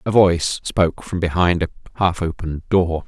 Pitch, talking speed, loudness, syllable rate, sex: 85 Hz, 175 wpm, -19 LUFS, 5.5 syllables/s, male